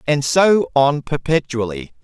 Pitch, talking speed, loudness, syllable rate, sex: 145 Hz, 120 wpm, -17 LUFS, 3.9 syllables/s, male